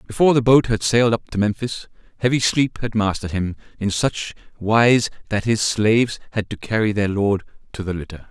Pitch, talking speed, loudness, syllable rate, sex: 110 Hz, 195 wpm, -20 LUFS, 5.6 syllables/s, male